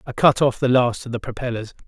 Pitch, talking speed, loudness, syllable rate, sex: 125 Hz, 255 wpm, -20 LUFS, 6.0 syllables/s, male